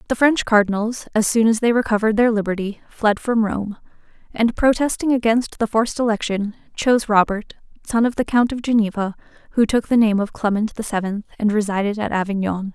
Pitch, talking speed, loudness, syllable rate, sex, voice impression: 220 Hz, 185 wpm, -19 LUFS, 5.7 syllables/s, female, very feminine, slightly young, slightly adult-like, very thin, tensed, slightly powerful, very bright, slightly soft, very clear, fluent, cute, slightly cool, intellectual, very refreshing, calm, very friendly, reassuring, elegant, sweet, slightly lively, kind, slightly sharp